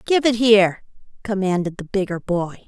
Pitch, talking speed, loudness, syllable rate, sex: 200 Hz, 155 wpm, -19 LUFS, 5.1 syllables/s, female